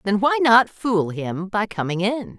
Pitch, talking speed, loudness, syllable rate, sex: 210 Hz, 200 wpm, -20 LUFS, 4.0 syllables/s, female